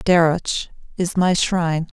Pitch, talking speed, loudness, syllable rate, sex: 170 Hz, 120 wpm, -20 LUFS, 4.7 syllables/s, female